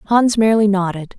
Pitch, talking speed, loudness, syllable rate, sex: 205 Hz, 150 wpm, -15 LUFS, 5.2 syllables/s, female